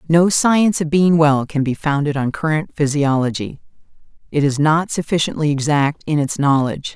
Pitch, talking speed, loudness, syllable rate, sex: 150 Hz, 165 wpm, -17 LUFS, 5.1 syllables/s, female